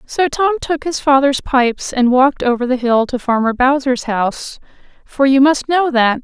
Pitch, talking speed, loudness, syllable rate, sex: 265 Hz, 190 wpm, -15 LUFS, 4.9 syllables/s, female